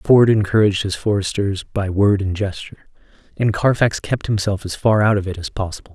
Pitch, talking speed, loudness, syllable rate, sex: 100 Hz, 190 wpm, -18 LUFS, 5.6 syllables/s, male